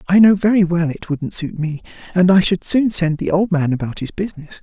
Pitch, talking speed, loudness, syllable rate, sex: 175 Hz, 245 wpm, -17 LUFS, 5.6 syllables/s, male